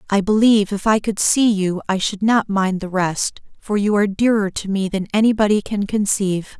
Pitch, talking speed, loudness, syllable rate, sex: 205 Hz, 210 wpm, -18 LUFS, 5.2 syllables/s, female